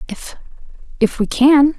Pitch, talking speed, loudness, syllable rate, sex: 265 Hz, 100 wpm, -15 LUFS, 4.1 syllables/s, female